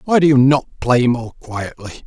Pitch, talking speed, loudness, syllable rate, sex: 130 Hz, 205 wpm, -16 LUFS, 4.8 syllables/s, male